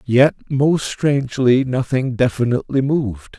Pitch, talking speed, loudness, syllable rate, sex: 130 Hz, 105 wpm, -18 LUFS, 4.5 syllables/s, male